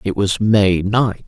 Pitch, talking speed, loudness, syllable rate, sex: 100 Hz, 190 wpm, -16 LUFS, 3.5 syllables/s, female